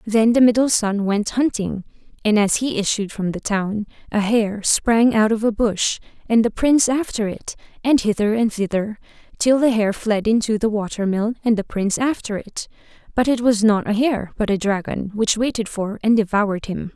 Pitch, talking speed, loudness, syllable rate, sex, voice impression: 215 Hz, 200 wpm, -19 LUFS, 4.9 syllables/s, female, very feminine, slightly young, slightly adult-like, very thin, tensed, powerful, bright, slightly soft, clear, very fluent, very cute, intellectual, very refreshing, sincere, slightly calm, very friendly, very reassuring, very unique, elegant, slightly wild, slightly sweet, very lively, slightly kind, slightly intense, slightly modest, light